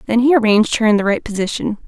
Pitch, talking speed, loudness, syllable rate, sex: 220 Hz, 255 wpm, -15 LUFS, 7.3 syllables/s, female